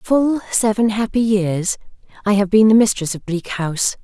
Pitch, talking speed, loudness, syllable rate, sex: 205 Hz, 180 wpm, -17 LUFS, 4.7 syllables/s, female